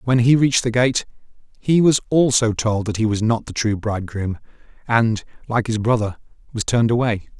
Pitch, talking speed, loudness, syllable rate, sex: 115 Hz, 195 wpm, -19 LUFS, 5.6 syllables/s, male